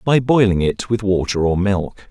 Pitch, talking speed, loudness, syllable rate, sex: 100 Hz, 200 wpm, -17 LUFS, 4.5 syllables/s, male